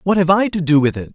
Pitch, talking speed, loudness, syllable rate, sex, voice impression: 170 Hz, 365 wpm, -16 LUFS, 6.7 syllables/s, male, masculine, adult-like, slightly clear, cool, slightly refreshing, sincere